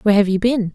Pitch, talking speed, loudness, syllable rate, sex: 210 Hz, 320 wpm, -17 LUFS, 7.7 syllables/s, female